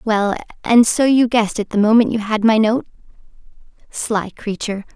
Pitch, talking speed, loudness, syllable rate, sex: 220 Hz, 170 wpm, -17 LUFS, 5.3 syllables/s, female